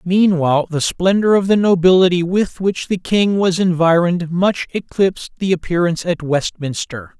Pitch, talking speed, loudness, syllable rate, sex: 180 Hz, 150 wpm, -16 LUFS, 5.0 syllables/s, male